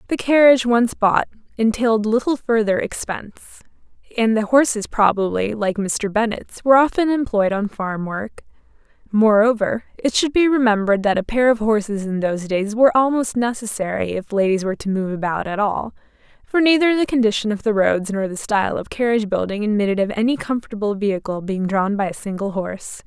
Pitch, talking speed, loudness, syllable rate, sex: 220 Hz, 180 wpm, -19 LUFS, 5.7 syllables/s, female